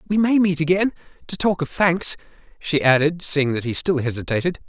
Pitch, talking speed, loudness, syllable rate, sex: 165 Hz, 180 wpm, -20 LUFS, 5.4 syllables/s, male